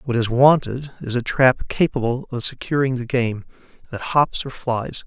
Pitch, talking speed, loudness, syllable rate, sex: 125 Hz, 180 wpm, -20 LUFS, 4.5 syllables/s, male